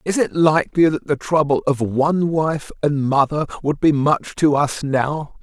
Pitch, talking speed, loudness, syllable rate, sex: 150 Hz, 190 wpm, -18 LUFS, 4.4 syllables/s, male